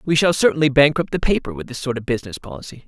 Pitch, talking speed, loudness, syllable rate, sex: 140 Hz, 250 wpm, -19 LUFS, 7.3 syllables/s, male